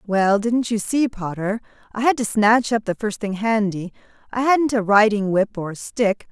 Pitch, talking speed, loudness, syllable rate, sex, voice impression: 215 Hz, 200 wpm, -20 LUFS, 4.4 syllables/s, female, feminine, adult-like, slightly intellectual, slightly friendly